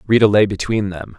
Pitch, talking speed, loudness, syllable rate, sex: 100 Hz, 200 wpm, -16 LUFS, 5.7 syllables/s, male